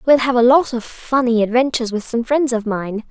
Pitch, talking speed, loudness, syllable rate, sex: 240 Hz, 230 wpm, -17 LUFS, 5.4 syllables/s, female